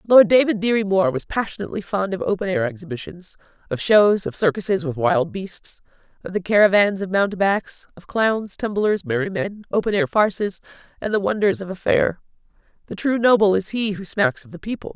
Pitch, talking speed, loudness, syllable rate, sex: 190 Hz, 185 wpm, -20 LUFS, 5.4 syllables/s, female